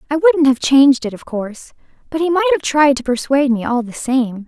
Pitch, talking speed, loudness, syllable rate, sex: 275 Hz, 240 wpm, -15 LUFS, 5.8 syllables/s, female